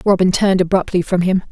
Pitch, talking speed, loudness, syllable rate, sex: 185 Hz, 200 wpm, -16 LUFS, 6.6 syllables/s, female